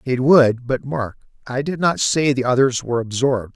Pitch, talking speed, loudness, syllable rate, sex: 130 Hz, 205 wpm, -18 LUFS, 5.1 syllables/s, male